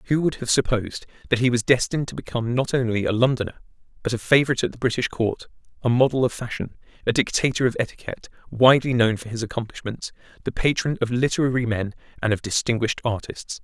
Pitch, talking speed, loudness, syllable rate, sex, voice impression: 120 Hz, 190 wpm, -23 LUFS, 6.8 syllables/s, male, masculine, adult-like, slightly clear, fluent, slightly refreshing, sincere, slightly sharp